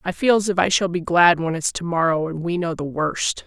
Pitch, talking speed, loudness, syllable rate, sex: 170 Hz, 295 wpm, -20 LUFS, 5.3 syllables/s, female